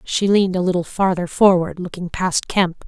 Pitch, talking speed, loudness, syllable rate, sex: 180 Hz, 190 wpm, -18 LUFS, 5.1 syllables/s, female